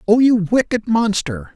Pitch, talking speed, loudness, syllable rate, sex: 200 Hz, 155 wpm, -16 LUFS, 4.3 syllables/s, male